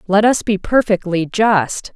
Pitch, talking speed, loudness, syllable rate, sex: 200 Hz, 155 wpm, -16 LUFS, 4.0 syllables/s, female